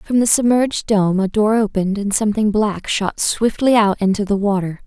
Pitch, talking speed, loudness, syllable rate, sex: 210 Hz, 195 wpm, -17 LUFS, 5.2 syllables/s, female